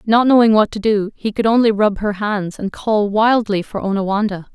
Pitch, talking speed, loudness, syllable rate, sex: 210 Hz, 210 wpm, -16 LUFS, 5.0 syllables/s, female